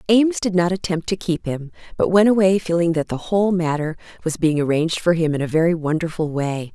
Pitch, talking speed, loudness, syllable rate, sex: 170 Hz, 220 wpm, -20 LUFS, 6.0 syllables/s, female